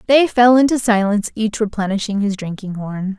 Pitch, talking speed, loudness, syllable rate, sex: 215 Hz, 170 wpm, -17 LUFS, 5.4 syllables/s, female